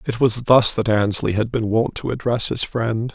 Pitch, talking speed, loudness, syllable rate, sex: 115 Hz, 230 wpm, -19 LUFS, 5.0 syllables/s, male